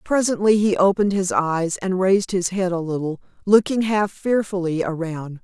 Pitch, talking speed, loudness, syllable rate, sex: 190 Hz, 165 wpm, -20 LUFS, 5.0 syllables/s, female